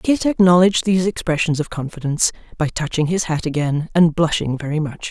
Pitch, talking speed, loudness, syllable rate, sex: 165 Hz, 175 wpm, -18 LUFS, 5.9 syllables/s, female